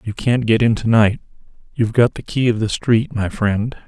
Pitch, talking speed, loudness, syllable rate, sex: 115 Hz, 230 wpm, -17 LUFS, 5.1 syllables/s, male